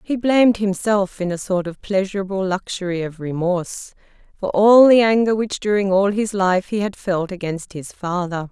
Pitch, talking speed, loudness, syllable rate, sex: 195 Hz, 185 wpm, -19 LUFS, 4.9 syllables/s, female